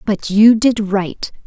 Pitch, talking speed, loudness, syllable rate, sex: 205 Hz, 165 wpm, -14 LUFS, 3.3 syllables/s, female